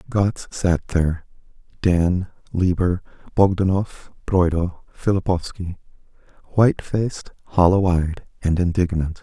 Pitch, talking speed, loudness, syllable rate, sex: 90 Hz, 85 wpm, -21 LUFS, 4.4 syllables/s, male